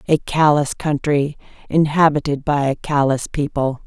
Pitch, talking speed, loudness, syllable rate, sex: 145 Hz, 125 wpm, -18 LUFS, 4.5 syllables/s, female